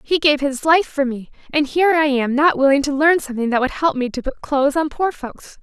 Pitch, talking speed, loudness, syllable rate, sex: 285 Hz, 265 wpm, -18 LUFS, 5.7 syllables/s, female